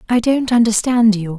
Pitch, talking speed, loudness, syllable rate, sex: 225 Hz, 175 wpm, -15 LUFS, 5.0 syllables/s, female